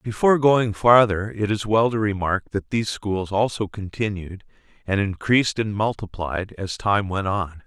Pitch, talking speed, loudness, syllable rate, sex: 105 Hz, 165 wpm, -22 LUFS, 4.6 syllables/s, male